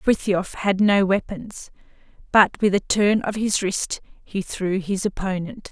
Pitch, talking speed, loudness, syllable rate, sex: 195 Hz, 160 wpm, -21 LUFS, 3.8 syllables/s, female